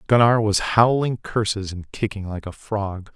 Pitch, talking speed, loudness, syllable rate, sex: 105 Hz, 170 wpm, -21 LUFS, 4.4 syllables/s, male